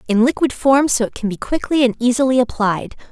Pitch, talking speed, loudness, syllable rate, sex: 250 Hz, 210 wpm, -17 LUFS, 5.8 syllables/s, female